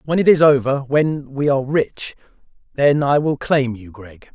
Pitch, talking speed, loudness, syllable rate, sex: 140 Hz, 165 wpm, -17 LUFS, 4.6 syllables/s, male